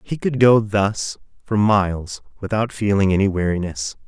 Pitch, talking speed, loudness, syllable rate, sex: 100 Hz, 145 wpm, -19 LUFS, 4.6 syllables/s, male